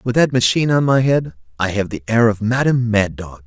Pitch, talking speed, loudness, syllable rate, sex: 115 Hz, 240 wpm, -17 LUFS, 5.8 syllables/s, male